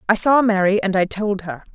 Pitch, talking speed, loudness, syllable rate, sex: 200 Hz, 240 wpm, -18 LUFS, 5.4 syllables/s, female